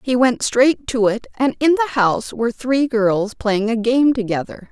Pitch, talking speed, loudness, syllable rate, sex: 240 Hz, 205 wpm, -18 LUFS, 4.6 syllables/s, female